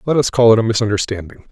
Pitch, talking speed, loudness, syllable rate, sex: 110 Hz, 240 wpm, -15 LUFS, 7.3 syllables/s, male